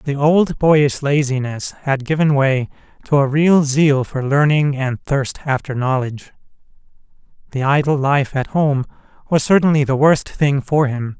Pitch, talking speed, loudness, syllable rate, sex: 140 Hz, 155 wpm, -17 LUFS, 4.3 syllables/s, male